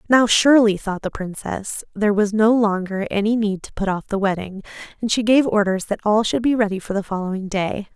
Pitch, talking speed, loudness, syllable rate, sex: 205 Hz, 220 wpm, -20 LUFS, 5.6 syllables/s, female